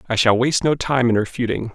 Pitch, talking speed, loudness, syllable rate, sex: 120 Hz, 240 wpm, -19 LUFS, 6.5 syllables/s, male